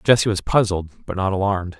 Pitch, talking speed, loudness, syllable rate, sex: 95 Hz, 200 wpm, -20 LUFS, 6.2 syllables/s, male